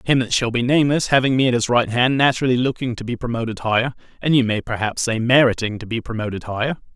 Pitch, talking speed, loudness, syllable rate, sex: 120 Hz, 235 wpm, -19 LUFS, 6.7 syllables/s, male